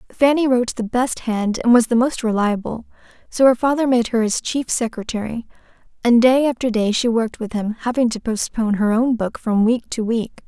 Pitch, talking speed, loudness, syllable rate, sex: 235 Hz, 205 wpm, -19 LUFS, 5.4 syllables/s, female